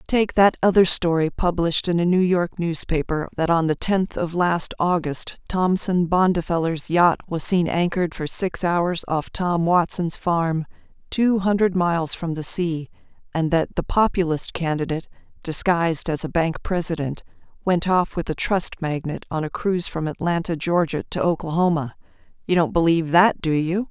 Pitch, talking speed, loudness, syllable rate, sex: 170 Hz, 165 wpm, -21 LUFS, 4.8 syllables/s, female